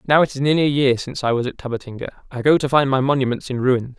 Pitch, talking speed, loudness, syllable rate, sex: 130 Hz, 285 wpm, -19 LUFS, 6.9 syllables/s, male